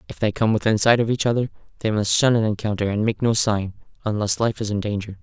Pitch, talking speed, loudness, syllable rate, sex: 110 Hz, 240 wpm, -21 LUFS, 6.3 syllables/s, male